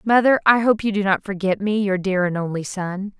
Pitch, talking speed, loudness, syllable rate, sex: 200 Hz, 245 wpm, -20 LUFS, 5.3 syllables/s, female